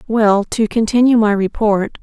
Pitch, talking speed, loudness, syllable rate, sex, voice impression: 215 Hz, 150 wpm, -14 LUFS, 4.4 syllables/s, female, feminine, adult-like, intellectual, calm, slightly kind